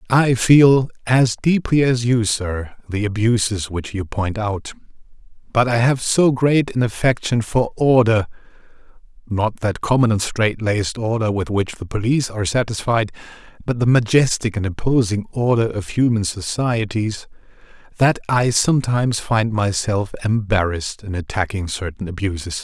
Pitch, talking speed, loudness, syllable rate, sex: 110 Hz, 140 wpm, -19 LUFS, 4.7 syllables/s, male